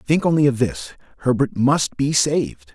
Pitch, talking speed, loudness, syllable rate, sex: 130 Hz, 175 wpm, -19 LUFS, 4.7 syllables/s, male